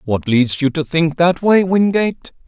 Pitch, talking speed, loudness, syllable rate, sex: 160 Hz, 195 wpm, -15 LUFS, 4.4 syllables/s, male